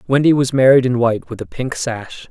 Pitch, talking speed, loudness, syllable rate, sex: 125 Hz, 235 wpm, -16 LUFS, 5.6 syllables/s, male